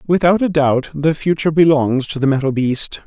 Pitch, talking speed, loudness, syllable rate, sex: 150 Hz, 195 wpm, -16 LUFS, 5.2 syllables/s, male